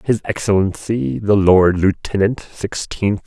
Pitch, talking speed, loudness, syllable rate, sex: 95 Hz, 110 wpm, -17 LUFS, 3.9 syllables/s, male